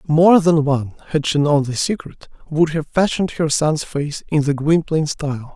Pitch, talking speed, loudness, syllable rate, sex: 155 Hz, 195 wpm, -18 LUFS, 4.8 syllables/s, male